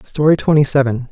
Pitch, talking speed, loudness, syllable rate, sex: 140 Hz, 160 wpm, -14 LUFS, 5.9 syllables/s, male